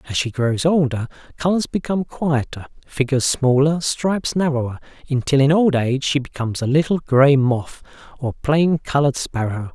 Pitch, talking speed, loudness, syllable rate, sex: 140 Hz, 155 wpm, -19 LUFS, 5.3 syllables/s, male